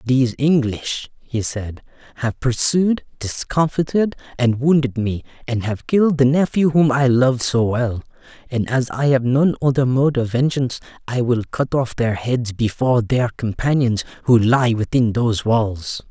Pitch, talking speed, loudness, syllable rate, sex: 125 Hz, 160 wpm, -19 LUFS, 4.5 syllables/s, male